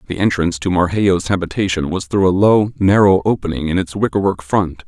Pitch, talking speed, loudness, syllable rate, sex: 90 Hz, 195 wpm, -16 LUFS, 5.7 syllables/s, male